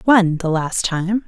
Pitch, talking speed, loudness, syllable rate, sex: 185 Hz, 190 wpm, -18 LUFS, 4.4 syllables/s, female